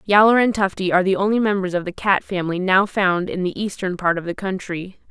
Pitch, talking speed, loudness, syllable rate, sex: 190 Hz, 235 wpm, -20 LUFS, 5.9 syllables/s, female